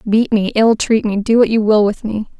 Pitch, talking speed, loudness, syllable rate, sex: 215 Hz, 275 wpm, -14 LUFS, 5.0 syllables/s, female